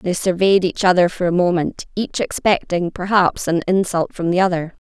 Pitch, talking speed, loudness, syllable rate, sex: 180 Hz, 185 wpm, -18 LUFS, 5.0 syllables/s, female